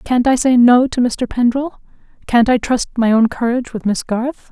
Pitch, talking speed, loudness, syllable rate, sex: 240 Hz, 210 wpm, -15 LUFS, 5.0 syllables/s, female